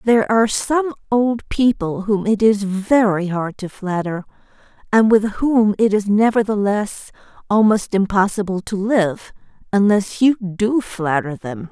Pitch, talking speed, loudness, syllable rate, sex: 205 Hz, 140 wpm, -18 LUFS, 4.1 syllables/s, female